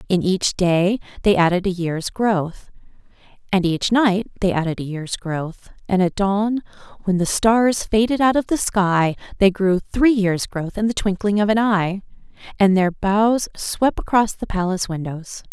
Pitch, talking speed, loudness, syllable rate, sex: 195 Hz, 180 wpm, -19 LUFS, 4.3 syllables/s, female